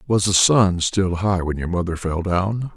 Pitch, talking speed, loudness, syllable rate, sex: 95 Hz, 215 wpm, -19 LUFS, 4.3 syllables/s, male